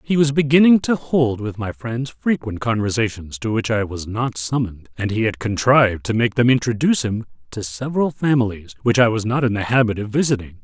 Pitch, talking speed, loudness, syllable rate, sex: 120 Hz, 210 wpm, -19 LUFS, 5.6 syllables/s, male